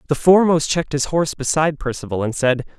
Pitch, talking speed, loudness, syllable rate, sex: 145 Hz, 195 wpm, -18 LUFS, 6.8 syllables/s, male